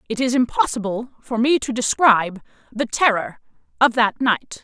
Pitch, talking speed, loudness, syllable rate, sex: 235 Hz, 155 wpm, -19 LUFS, 4.9 syllables/s, female